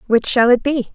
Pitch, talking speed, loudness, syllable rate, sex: 245 Hz, 255 wpm, -15 LUFS, 5.3 syllables/s, female